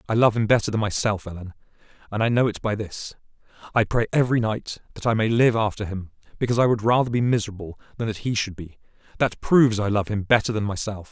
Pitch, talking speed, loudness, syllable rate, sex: 110 Hz, 225 wpm, -23 LUFS, 6.5 syllables/s, male